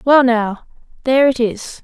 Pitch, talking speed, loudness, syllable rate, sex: 245 Hz, 165 wpm, -16 LUFS, 4.5 syllables/s, female